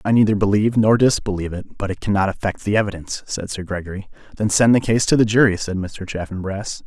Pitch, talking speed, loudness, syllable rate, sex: 100 Hz, 220 wpm, -19 LUFS, 6.4 syllables/s, male